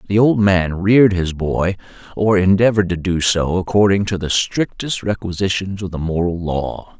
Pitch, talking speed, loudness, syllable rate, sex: 95 Hz, 155 wpm, -17 LUFS, 4.8 syllables/s, male